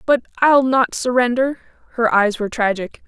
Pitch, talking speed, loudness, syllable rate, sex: 240 Hz, 155 wpm, -17 LUFS, 5.0 syllables/s, female